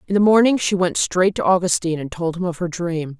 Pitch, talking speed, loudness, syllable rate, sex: 180 Hz, 265 wpm, -19 LUFS, 5.9 syllables/s, female